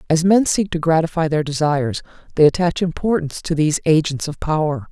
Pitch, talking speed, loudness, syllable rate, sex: 160 Hz, 185 wpm, -18 LUFS, 6.0 syllables/s, female